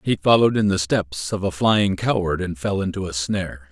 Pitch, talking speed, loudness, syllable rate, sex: 95 Hz, 225 wpm, -21 LUFS, 5.3 syllables/s, male